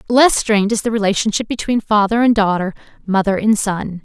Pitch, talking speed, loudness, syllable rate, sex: 210 Hz, 180 wpm, -16 LUFS, 5.6 syllables/s, female